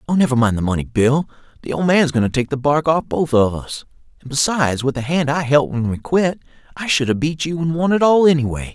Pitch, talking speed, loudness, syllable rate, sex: 145 Hz, 270 wpm, -18 LUFS, 5.9 syllables/s, male